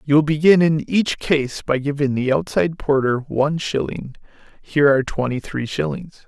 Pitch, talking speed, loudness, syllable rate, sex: 140 Hz, 170 wpm, -19 LUFS, 5.1 syllables/s, male